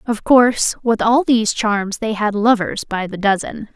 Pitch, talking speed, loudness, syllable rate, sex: 220 Hz, 190 wpm, -16 LUFS, 4.5 syllables/s, female